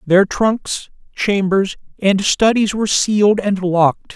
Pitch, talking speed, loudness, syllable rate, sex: 200 Hz, 130 wpm, -16 LUFS, 3.9 syllables/s, male